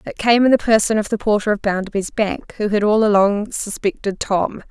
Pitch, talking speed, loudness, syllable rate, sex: 210 Hz, 215 wpm, -18 LUFS, 5.3 syllables/s, female